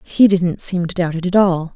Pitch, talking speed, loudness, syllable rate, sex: 180 Hz, 275 wpm, -16 LUFS, 4.9 syllables/s, female